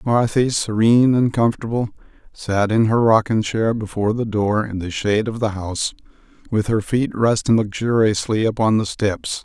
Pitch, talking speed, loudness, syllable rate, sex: 110 Hz, 165 wpm, -19 LUFS, 5.1 syllables/s, male